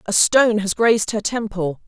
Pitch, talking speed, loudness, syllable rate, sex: 210 Hz, 190 wpm, -18 LUFS, 5.2 syllables/s, female